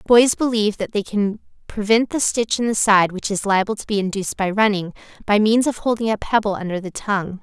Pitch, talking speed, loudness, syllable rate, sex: 210 Hz, 225 wpm, -19 LUFS, 5.8 syllables/s, female